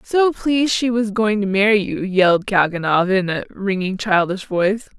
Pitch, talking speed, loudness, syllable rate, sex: 205 Hz, 180 wpm, -18 LUFS, 4.8 syllables/s, female